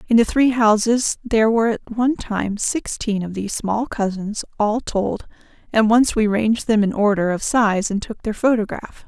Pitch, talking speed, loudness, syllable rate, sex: 220 Hz, 190 wpm, -19 LUFS, 4.9 syllables/s, female